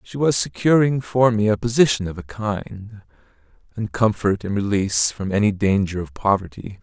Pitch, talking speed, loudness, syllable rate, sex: 105 Hz, 165 wpm, -20 LUFS, 5.0 syllables/s, male